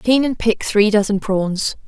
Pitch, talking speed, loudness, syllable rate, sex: 215 Hz, 190 wpm, -17 LUFS, 4.0 syllables/s, female